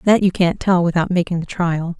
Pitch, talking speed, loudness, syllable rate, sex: 175 Hz, 240 wpm, -18 LUFS, 5.4 syllables/s, female